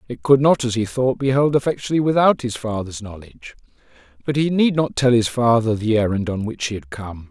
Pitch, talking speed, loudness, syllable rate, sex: 120 Hz, 220 wpm, -19 LUFS, 5.8 syllables/s, male